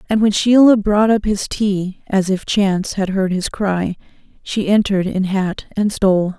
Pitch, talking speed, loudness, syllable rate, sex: 200 Hz, 190 wpm, -17 LUFS, 4.5 syllables/s, female